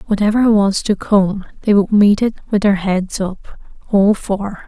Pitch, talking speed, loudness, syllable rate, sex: 200 Hz, 165 wpm, -15 LUFS, 4.2 syllables/s, female